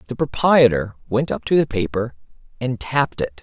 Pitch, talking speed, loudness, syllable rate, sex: 120 Hz, 175 wpm, -20 LUFS, 5.3 syllables/s, male